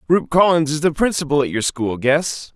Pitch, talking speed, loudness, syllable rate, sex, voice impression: 150 Hz, 210 wpm, -18 LUFS, 5.0 syllables/s, male, very masculine, very adult-like, slightly thick, cool, slightly intellectual, slightly calm, slightly kind